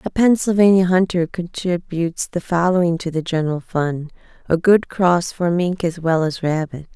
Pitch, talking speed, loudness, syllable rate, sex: 175 Hz, 165 wpm, -18 LUFS, 4.8 syllables/s, female